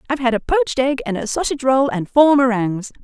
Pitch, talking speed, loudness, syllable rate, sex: 255 Hz, 240 wpm, -17 LUFS, 6.5 syllables/s, female